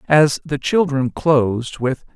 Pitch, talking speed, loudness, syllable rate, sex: 140 Hz, 140 wpm, -18 LUFS, 3.7 syllables/s, male